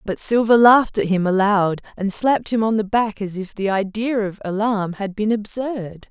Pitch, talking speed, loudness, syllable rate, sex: 210 Hz, 205 wpm, -19 LUFS, 4.8 syllables/s, female